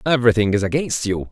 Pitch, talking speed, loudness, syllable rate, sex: 115 Hz, 185 wpm, -19 LUFS, 6.7 syllables/s, male